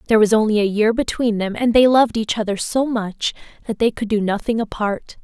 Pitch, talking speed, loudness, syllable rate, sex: 220 Hz, 230 wpm, -18 LUFS, 5.8 syllables/s, female